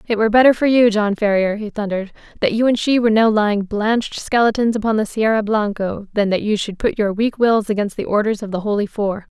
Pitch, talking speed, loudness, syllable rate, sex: 215 Hz, 235 wpm, -17 LUFS, 6.0 syllables/s, female